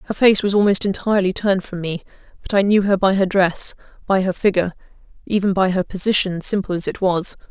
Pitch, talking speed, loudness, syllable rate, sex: 190 Hz, 200 wpm, -18 LUFS, 6.0 syllables/s, female